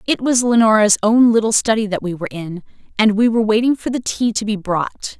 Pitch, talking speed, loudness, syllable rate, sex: 215 Hz, 230 wpm, -16 LUFS, 5.8 syllables/s, female